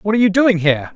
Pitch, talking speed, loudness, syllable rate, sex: 195 Hz, 315 wpm, -15 LUFS, 7.7 syllables/s, male